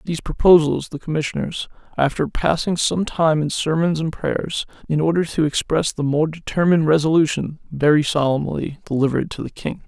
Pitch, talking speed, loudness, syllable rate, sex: 155 Hz, 160 wpm, -20 LUFS, 5.4 syllables/s, male